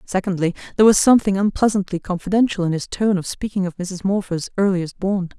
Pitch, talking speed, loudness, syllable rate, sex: 190 Hz, 180 wpm, -19 LUFS, 6.2 syllables/s, female